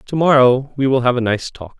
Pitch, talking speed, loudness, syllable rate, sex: 130 Hz, 265 wpm, -15 LUFS, 5.3 syllables/s, male